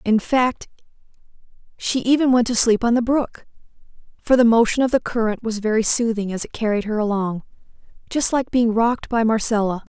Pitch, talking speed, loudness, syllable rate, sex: 230 Hz, 175 wpm, -19 LUFS, 5.5 syllables/s, female